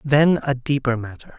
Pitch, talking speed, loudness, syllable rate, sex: 135 Hz, 175 wpm, -20 LUFS, 4.8 syllables/s, male